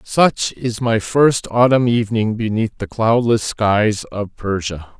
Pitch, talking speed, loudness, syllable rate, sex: 110 Hz, 145 wpm, -17 LUFS, 3.7 syllables/s, male